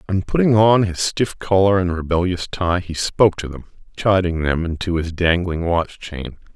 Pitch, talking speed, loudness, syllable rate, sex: 90 Hz, 185 wpm, -19 LUFS, 4.8 syllables/s, male